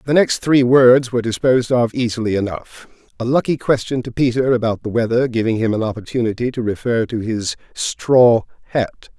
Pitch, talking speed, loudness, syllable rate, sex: 120 Hz, 175 wpm, -17 LUFS, 5.3 syllables/s, male